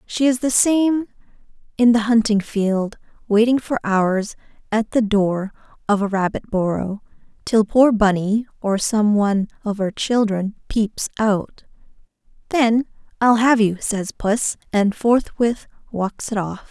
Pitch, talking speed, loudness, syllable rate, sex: 215 Hz, 145 wpm, -19 LUFS, 3.9 syllables/s, female